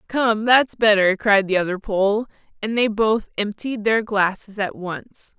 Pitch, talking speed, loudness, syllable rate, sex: 220 Hz, 165 wpm, -20 LUFS, 4.0 syllables/s, female